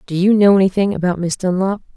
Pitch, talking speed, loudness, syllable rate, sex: 190 Hz, 215 wpm, -15 LUFS, 6.4 syllables/s, female